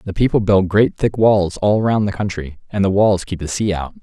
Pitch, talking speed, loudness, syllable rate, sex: 100 Hz, 255 wpm, -17 LUFS, 5.1 syllables/s, male